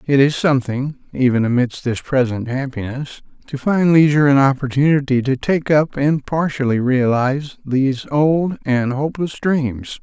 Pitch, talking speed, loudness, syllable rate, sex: 140 Hz, 145 wpm, -17 LUFS, 4.8 syllables/s, male